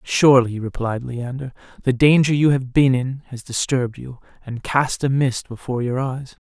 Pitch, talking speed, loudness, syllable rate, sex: 130 Hz, 175 wpm, -19 LUFS, 5.0 syllables/s, male